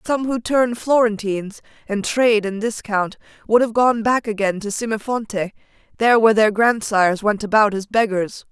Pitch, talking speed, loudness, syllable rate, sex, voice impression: 215 Hz, 160 wpm, -19 LUFS, 5.2 syllables/s, female, feminine, adult-like, powerful, clear, slightly raspy, intellectual, slightly wild, lively, strict, intense, sharp